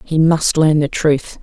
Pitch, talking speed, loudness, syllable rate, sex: 155 Hz, 210 wpm, -15 LUFS, 3.8 syllables/s, female